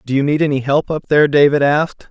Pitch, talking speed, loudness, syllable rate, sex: 145 Hz, 255 wpm, -15 LUFS, 6.5 syllables/s, male